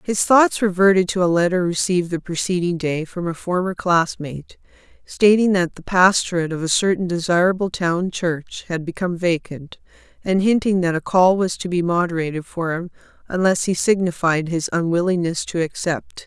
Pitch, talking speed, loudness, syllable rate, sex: 175 Hz, 165 wpm, -19 LUFS, 5.2 syllables/s, female